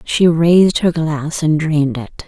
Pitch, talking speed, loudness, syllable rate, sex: 160 Hz, 185 wpm, -14 LUFS, 4.2 syllables/s, female